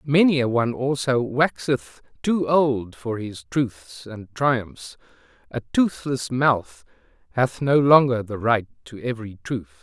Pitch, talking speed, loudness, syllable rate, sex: 120 Hz, 140 wpm, -22 LUFS, 3.8 syllables/s, male